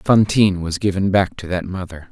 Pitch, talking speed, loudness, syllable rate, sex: 95 Hz, 200 wpm, -18 LUFS, 5.5 syllables/s, male